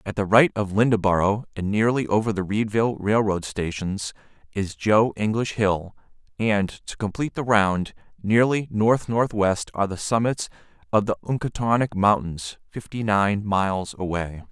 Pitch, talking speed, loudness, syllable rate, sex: 105 Hz, 145 wpm, -23 LUFS, 4.7 syllables/s, male